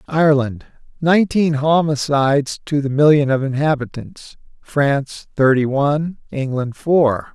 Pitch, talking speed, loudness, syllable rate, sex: 145 Hz, 105 wpm, -17 LUFS, 4.4 syllables/s, male